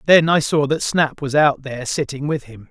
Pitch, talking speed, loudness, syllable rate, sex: 145 Hz, 245 wpm, -18 LUFS, 5.1 syllables/s, male